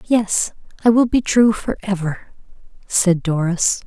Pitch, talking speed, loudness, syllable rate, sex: 200 Hz, 125 wpm, -18 LUFS, 3.8 syllables/s, female